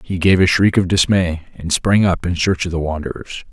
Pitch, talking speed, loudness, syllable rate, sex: 90 Hz, 240 wpm, -16 LUFS, 5.2 syllables/s, male